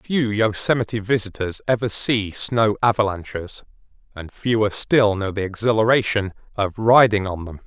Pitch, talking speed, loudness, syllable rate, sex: 105 Hz, 135 wpm, -20 LUFS, 4.7 syllables/s, male